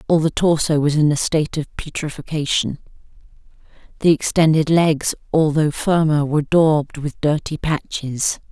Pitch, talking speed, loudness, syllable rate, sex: 155 Hz, 135 wpm, -18 LUFS, 4.9 syllables/s, female